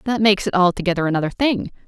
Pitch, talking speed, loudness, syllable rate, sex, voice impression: 190 Hz, 190 wpm, -19 LUFS, 7.5 syllables/s, female, feminine, slightly gender-neutral, adult-like, slightly middle-aged, slightly thin, tensed, slightly powerful, bright, slightly hard, clear, fluent, cool, intellectual, slightly refreshing, sincere, slightly calm, slightly friendly, slightly elegant, slightly sweet, lively, strict, slightly intense, slightly sharp